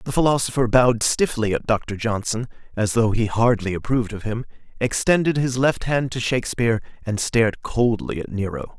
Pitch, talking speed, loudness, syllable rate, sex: 115 Hz, 170 wpm, -21 LUFS, 5.5 syllables/s, male